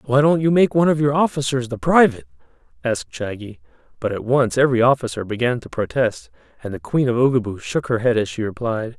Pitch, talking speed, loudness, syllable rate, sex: 125 Hz, 205 wpm, -19 LUFS, 6.3 syllables/s, male